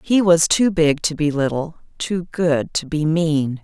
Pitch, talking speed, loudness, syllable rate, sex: 160 Hz, 200 wpm, -18 LUFS, 3.9 syllables/s, female